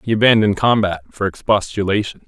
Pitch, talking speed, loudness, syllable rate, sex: 105 Hz, 130 wpm, -17 LUFS, 6.1 syllables/s, male